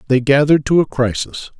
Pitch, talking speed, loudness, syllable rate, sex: 140 Hz, 190 wpm, -15 LUFS, 6.0 syllables/s, male